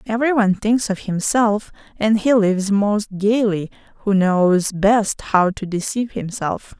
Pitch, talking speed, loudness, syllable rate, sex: 205 Hz, 140 wpm, -18 LUFS, 4.1 syllables/s, female